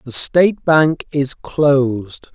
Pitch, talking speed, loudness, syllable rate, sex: 140 Hz, 130 wpm, -15 LUFS, 3.4 syllables/s, male